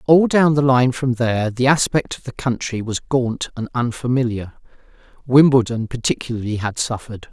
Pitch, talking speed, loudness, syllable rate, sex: 125 Hz, 155 wpm, -19 LUFS, 5.2 syllables/s, male